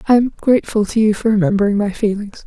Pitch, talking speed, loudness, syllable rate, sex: 215 Hz, 220 wpm, -16 LUFS, 6.8 syllables/s, female